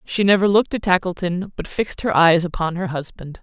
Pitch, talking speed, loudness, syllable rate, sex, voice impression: 180 Hz, 210 wpm, -19 LUFS, 5.8 syllables/s, female, slightly feminine, slightly adult-like, refreshing, slightly friendly, slightly unique